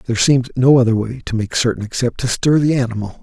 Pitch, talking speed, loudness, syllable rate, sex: 120 Hz, 240 wpm, -16 LUFS, 6.7 syllables/s, male